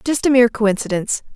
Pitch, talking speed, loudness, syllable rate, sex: 230 Hz, 175 wpm, -17 LUFS, 6.9 syllables/s, female